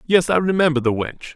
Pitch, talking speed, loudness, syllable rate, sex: 155 Hz, 220 wpm, -19 LUFS, 5.8 syllables/s, male